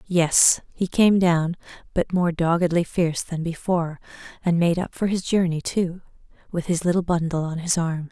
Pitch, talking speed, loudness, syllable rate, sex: 170 Hz, 175 wpm, -22 LUFS, 4.9 syllables/s, female